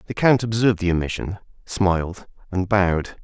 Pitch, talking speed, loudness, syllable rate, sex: 95 Hz, 150 wpm, -21 LUFS, 5.5 syllables/s, male